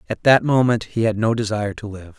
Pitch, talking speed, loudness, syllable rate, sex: 110 Hz, 245 wpm, -19 LUFS, 6.0 syllables/s, male